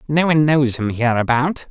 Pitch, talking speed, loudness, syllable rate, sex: 135 Hz, 175 wpm, -17 LUFS, 5.2 syllables/s, male